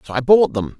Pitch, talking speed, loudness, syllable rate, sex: 140 Hz, 305 wpm, -15 LUFS, 6.2 syllables/s, male